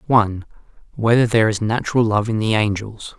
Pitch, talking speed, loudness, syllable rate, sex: 110 Hz, 170 wpm, -18 LUFS, 6.5 syllables/s, male